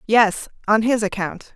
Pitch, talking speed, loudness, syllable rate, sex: 215 Hz, 155 wpm, -20 LUFS, 4.1 syllables/s, female